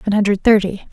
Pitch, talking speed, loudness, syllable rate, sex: 200 Hz, 195 wpm, -15 LUFS, 7.8 syllables/s, female